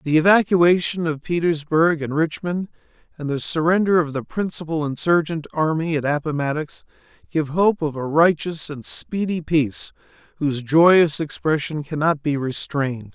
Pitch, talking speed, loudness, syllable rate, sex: 155 Hz, 135 wpm, -20 LUFS, 4.6 syllables/s, male